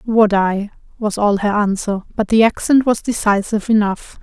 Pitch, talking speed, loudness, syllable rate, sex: 210 Hz, 170 wpm, -16 LUFS, 4.8 syllables/s, female